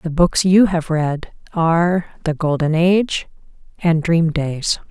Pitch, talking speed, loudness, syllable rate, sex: 165 Hz, 145 wpm, -17 LUFS, 3.9 syllables/s, female